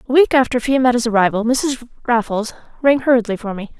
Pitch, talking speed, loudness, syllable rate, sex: 240 Hz, 175 wpm, -17 LUFS, 6.0 syllables/s, female